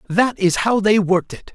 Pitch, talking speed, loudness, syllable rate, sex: 200 Hz, 235 wpm, -17 LUFS, 5.1 syllables/s, male